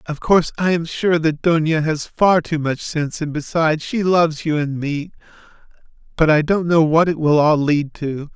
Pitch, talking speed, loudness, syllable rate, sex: 155 Hz, 210 wpm, -18 LUFS, 4.9 syllables/s, male